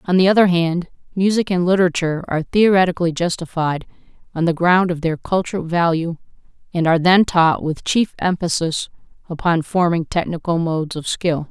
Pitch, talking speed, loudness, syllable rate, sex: 170 Hz, 155 wpm, -18 LUFS, 5.6 syllables/s, female